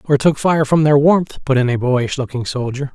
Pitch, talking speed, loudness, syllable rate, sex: 140 Hz, 245 wpm, -16 LUFS, 5.0 syllables/s, male